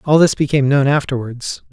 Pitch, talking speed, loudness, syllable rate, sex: 140 Hz, 175 wpm, -16 LUFS, 5.7 syllables/s, male